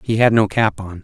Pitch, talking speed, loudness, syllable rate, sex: 105 Hz, 290 wpm, -16 LUFS, 5.4 syllables/s, male